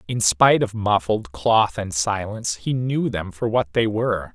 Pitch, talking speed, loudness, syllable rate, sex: 105 Hz, 195 wpm, -21 LUFS, 4.6 syllables/s, male